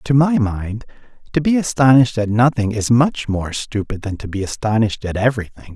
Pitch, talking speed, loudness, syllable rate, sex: 115 Hz, 190 wpm, -18 LUFS, 5.5 syllables/s, male